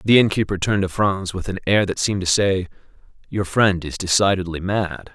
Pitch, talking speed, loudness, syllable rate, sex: 95 Hz, 210 wpm, -20 LUFS, 5.5 syllables/s, male